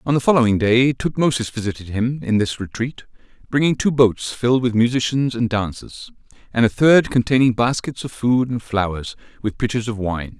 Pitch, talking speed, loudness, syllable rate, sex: 120 Hz, 180 wpm, -19 LUFS, 5.2 syllables/s, male